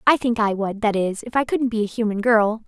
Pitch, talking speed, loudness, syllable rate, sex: 220 Hz, 270 wpm, -21 LUFS, 5.6 syllables/s, female